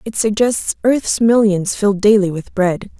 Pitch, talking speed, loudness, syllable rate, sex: 205 Hz, 160 wpm, -15 LUFS, 4.4 syllables/s, female